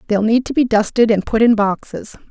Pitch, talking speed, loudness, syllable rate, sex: 220 Hz, 235 wpm, -15 LUFS, 5.5 syllables/s, female